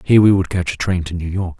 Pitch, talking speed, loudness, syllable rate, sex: 90 Hz, 340 wpm, -17 LUFS, 6.7 syllables/s, male